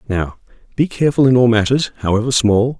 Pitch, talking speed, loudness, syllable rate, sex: 120 Hz, 170 wpm, -15 LUFS, 6.0 syllables/s, male